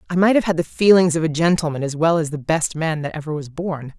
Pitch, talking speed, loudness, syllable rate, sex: 160 Hz, 285 wpm, -19 LUFS, 6.1 syllables/s, female